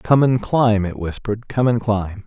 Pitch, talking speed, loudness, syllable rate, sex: 110 Hz, 210 wpm, -19 LUFS, 4.5 syllables/s, male